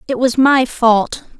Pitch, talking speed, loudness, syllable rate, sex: 245 Hz, 170 wpm, -13 LUFS, 3.7 syllables/s, female